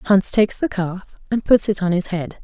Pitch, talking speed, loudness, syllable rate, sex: 195 Hz, 245 wpm, -19 LUFS, 5.2 syllables/s, female